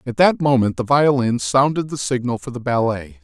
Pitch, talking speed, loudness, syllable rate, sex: 125 Hz, 205 wpm, -18 LUFS, 5.2 syllables/s, male